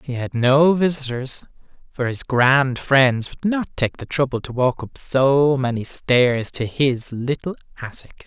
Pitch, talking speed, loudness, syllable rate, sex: 130 Hz, 165 wpm, -19 LUFS, 3.9 syllables/s, male